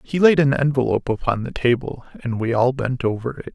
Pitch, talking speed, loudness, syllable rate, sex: 125 Hz, 220 wpm, -20 LUFS, 5.6 syllables/s, male